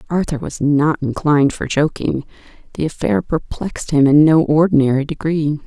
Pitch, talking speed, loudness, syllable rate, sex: 145 Hz, 150 wpm, -16 LUFS, 5.1 syllables/s, female